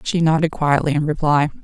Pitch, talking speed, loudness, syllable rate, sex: 150 Hz, 185 wpm, -18 LUFS, 5.6 syllables/s, female